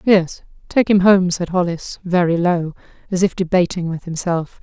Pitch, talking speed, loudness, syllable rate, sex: 180 Hz, 170 wpm, -18 LUFS, 4.6 syllables/s, female